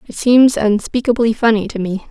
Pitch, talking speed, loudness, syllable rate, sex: 225 Hz, 170 wpm, -14 LUFS, 5.1 syllables/s, female